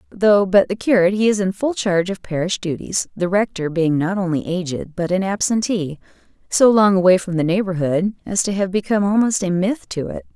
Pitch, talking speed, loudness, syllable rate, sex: 190 Hz, 205 wpm, -18 LUFS, 5.6 syllables/s, female